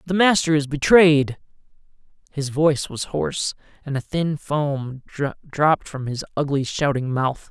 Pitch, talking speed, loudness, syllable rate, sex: 145 Hz, 145 wpm, -21 LUFS, 4.4 syllables/s, male